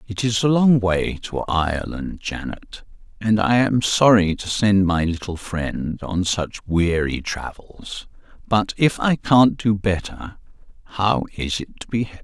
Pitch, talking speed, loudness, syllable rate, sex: 100 Hz, 160 wpm, -20 LUFS, 4.0 syllables/s, male